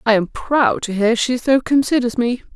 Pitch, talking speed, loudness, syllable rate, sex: 240 Hz, 210 wpm, -17 LUFS, 4.7 syllables/s, female